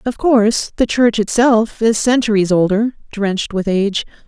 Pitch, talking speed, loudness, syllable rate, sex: 220 Hz, 155 wpm, -15 LUFS, 4.9 syllables/s, female